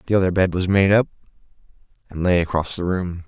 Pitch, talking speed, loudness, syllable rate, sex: 90 Hz, 200 wpm, -20 LUFS, 6.3 syllables/s, male